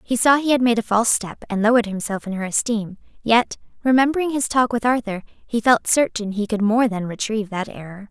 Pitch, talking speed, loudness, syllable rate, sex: 225 Hz, 220 wpm, -20 LUFS, 5.8 syllables/s, female